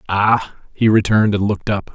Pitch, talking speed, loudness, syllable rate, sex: 105 Hz, 185 wpm, -16 LUFS, 5.5 syllables/s, male